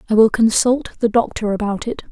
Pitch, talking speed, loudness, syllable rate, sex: 225 Hz, 200 wpm, -17 LUFS, 5.8 syllables/s, female